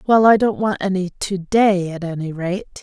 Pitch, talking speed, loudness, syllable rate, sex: 190 Hz, 210 wpm, -18 LUFS, 4.6 syllables/s, female